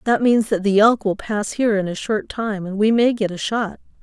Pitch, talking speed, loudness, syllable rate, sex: 210 Hz, 270 wpm, -19 LUFS, 5.1 syllables/s, female